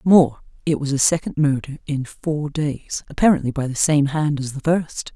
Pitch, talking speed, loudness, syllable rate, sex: 145 Hz, 200 wpm, -20 LUFS, 4.7 syllables/s, female